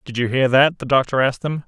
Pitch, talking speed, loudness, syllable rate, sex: 135 Hz, 285 wpm, -18 LUFS, 6.4 syllables/s, male